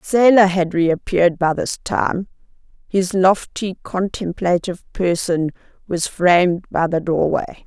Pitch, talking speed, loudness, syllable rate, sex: 180 Hz, 115 wpm, -18 LUFS, 4.0 syllables/s, female